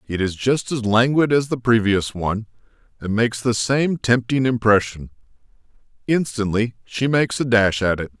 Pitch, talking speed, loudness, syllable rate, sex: 115 Hz, 160 wpm, -19 LUFS, 5.0 syllables/s, male